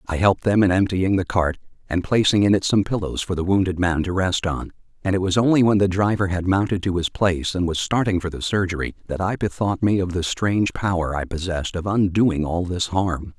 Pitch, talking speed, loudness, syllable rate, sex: 95 Hz, 240 wpm, -21 LUFS, 5.7 syllables/s, male